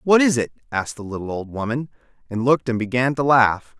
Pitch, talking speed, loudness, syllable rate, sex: 125 Hz, 220 wpm, -21 LUFS, 6.1 syllables/s, male